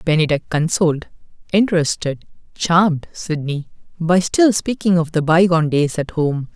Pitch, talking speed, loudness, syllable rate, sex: 165 Hz, 130 wpm, -18 LUFS, 4.8 syllables/s, male